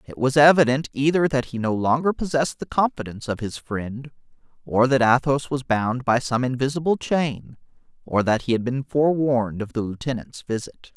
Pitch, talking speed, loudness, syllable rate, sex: 130 Hz, 180 wpm, -22 LUFS, 5.3 syllables/s, male